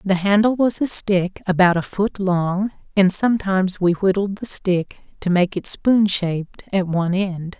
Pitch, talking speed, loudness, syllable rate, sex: 190 Hz, 180 wpm, -19 LUFS, 4.5 syllables/s, female